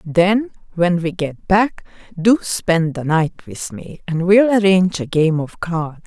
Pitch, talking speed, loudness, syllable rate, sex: 180 Hz, 180 wpm, -17 LUFS, 3.8 syllables/s, female